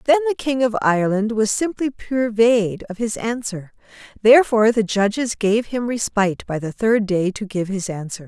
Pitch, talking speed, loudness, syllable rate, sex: 220 Hz, 180 wpm, -19 LUFS, 5.0 syllables/s, female